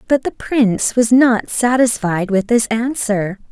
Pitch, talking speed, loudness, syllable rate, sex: 230 Hz, 155 wpm, -16 LUFS, 4.0 syllables/s, female